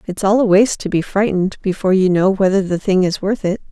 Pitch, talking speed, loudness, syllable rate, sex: 195 Hz, 240 wpm, -16 LUFS, 6.1 syllables/s, female